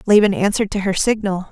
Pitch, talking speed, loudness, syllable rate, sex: 200 Hz, 200 wpm, -17 LUFS, 6.5 syllables/s, female